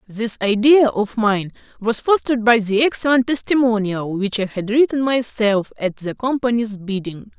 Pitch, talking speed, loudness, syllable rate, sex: 225 Hz, 155 wpm, -18 LUFS, 4.7 syllables/s, female